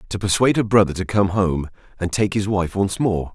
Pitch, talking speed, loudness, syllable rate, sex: 95 Hz, 235 wpm, -20 LUFS, 5.6 syllables/s, male